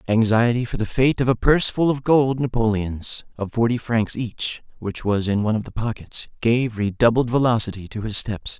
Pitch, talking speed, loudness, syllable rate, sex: 115 Hz, 195 wpm, -21 LUFS, 5.1 syllables/s, male